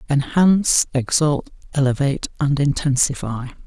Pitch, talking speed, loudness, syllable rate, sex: 140 Hz, 80 wpm, -19 LUFS, 4.7 syllables/s, male